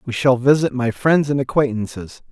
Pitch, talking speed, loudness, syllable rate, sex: 125 Hz, 180 wpm, -18 LUFS, 5.1 syllables/s, male